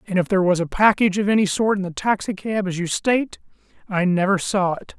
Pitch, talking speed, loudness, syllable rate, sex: 195 Hz, 230 wpm, -20 LUFS, 6.2 syllables/s, male